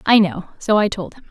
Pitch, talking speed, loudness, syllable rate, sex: 210 Hz, 275 wpm, -18 LUFS, 5.6 syllables/s, female